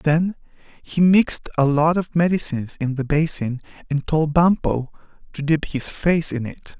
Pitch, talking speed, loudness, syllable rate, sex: 155 Hz, 170 wpm, -20 LUFS, 4.5 syllables/s, male